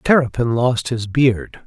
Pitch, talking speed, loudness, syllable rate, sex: 120 Hz, 145 wpm, -18 LUFS, 3.7 syllables/s, male